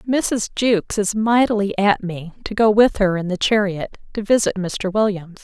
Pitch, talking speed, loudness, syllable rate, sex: 205 Hz, 190 wpm, -19 LUFS, 4.6 syllables/s, female